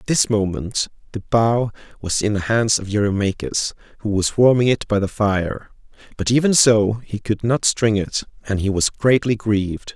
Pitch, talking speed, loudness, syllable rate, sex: 105 Hz, 185 wpm, -19 LUFS, 4.7 syllables/s, male